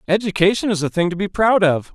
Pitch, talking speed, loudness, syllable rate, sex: 190 Hz, 245 wpm, -18 LUFS, 6.2 syllables/s, male